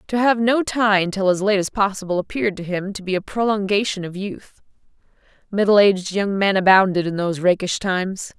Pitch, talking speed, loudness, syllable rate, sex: 195 Hz, 195 wpm, -19 LUFS, 5.7 syllables/s, female